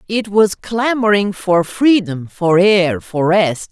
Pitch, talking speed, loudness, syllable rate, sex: 195 Hz, 145 wpm, -15 LUFS, 3.4 syllables/s, female